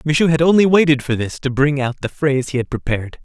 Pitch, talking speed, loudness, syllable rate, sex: 140 Hz, 260 wpm, -17 LUFS, 6.6 syllables/s, male